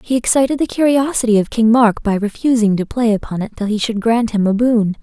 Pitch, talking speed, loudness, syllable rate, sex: 225 Hz, 240 wpm, -15 LUFS, 5.7 syllables/s, female